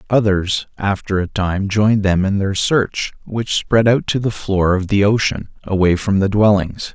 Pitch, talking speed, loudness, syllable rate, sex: 100 Hz, 190 wpm, -17 LUFS, 4.4 syllables/s, male